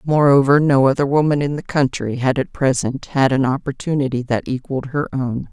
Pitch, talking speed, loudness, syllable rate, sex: 135 Hz, 185 wpm, -18 LUFS, 5.4 syllables/s, female